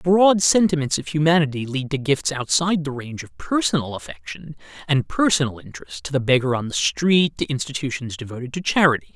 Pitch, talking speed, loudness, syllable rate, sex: 145 Hz, 175 wpm, -20 LUFS, 5.8 syllables/s, male